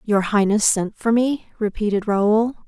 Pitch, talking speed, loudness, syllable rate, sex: 215 Hz, 155 wpm, -19 LUFS, 4.2 syllables/s, female